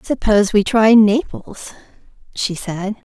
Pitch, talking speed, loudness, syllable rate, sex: 215 Hz, 115 wpm, -15 LUFS, 4.0 syllables/s, female